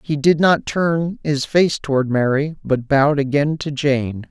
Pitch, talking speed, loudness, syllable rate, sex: 145 Hz, 180 wpm, -18 LUFS, 4.2 syllables/s, male